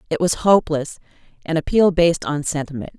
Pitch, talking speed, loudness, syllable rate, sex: 160 Hz, 140 wpm, -19 LUFS, 6.2 syllables/s, female